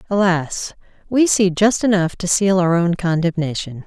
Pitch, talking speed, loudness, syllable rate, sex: 180 Hz, 155 wpm, -17 LUFS, 4.5 syllables/s, female